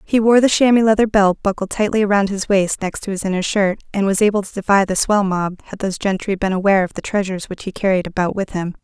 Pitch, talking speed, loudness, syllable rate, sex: 200 Hz, 260 wpm, -17 LUFS, 6.3 syllables/s, female